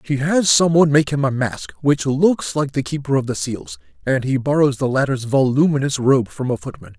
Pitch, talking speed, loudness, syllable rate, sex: 130 Hz, 215 wpm, -18 LUFS, 5.2 syllables/s, male